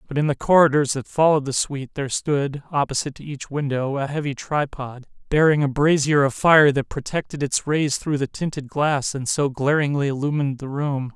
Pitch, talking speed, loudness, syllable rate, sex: 140 Hz, 195 wpm, -21 LUFS, 5.5 syllables/s, male